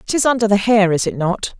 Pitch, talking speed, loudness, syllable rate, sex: 210 Hz, 300 wpm, -16 LUFS, 6.2 syllables/s, female